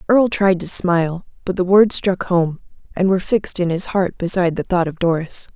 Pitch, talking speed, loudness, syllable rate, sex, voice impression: 180 Hz, 215 wpm, -17 LUFS, 5.7 syllables/s, female, very feminine, slightly middle-aged, thin, slightly relaxed, slightly weak, bright, soft, very clear, slightly halting, cute, slightly cool, intellectual, very refreshing, sincere, very calm, friendly, very reassuring, slightly unique, elegant, sweet, lively, kind, slightly modest